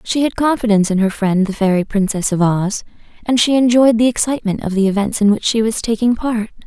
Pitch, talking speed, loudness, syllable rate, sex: 215 Hz, 225 wpm, -15 LUFS, 5.9 syllables/s, female